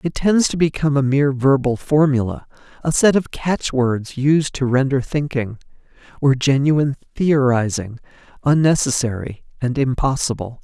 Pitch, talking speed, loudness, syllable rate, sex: 135 Hz, 125 wpm, -18 LUFS, 4.8 syllables/s, male